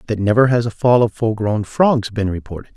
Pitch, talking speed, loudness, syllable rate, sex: 110 Hz, 240 wpm, -17 LUFS, 5.6 syllables/s, male